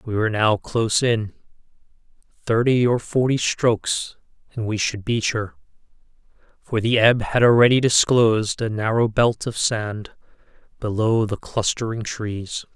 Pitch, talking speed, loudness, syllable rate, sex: 110 Hz, 135 wpm, -20 LUFS, 4.4 syllables/s, male